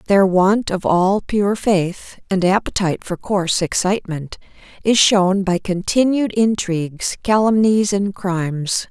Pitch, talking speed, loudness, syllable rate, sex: 195 Hz, 130 wpm, -17 LUFS, 4.0 syllables/s, female